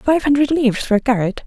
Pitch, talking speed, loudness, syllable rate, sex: 255 Hz, 245 wpm, -16 LUFS, 6.3 syllables/s, female